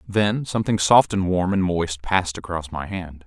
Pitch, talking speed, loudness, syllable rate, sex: 90 Hz, 200 wpm, -21 LUFS, 4.8 syllables/s, male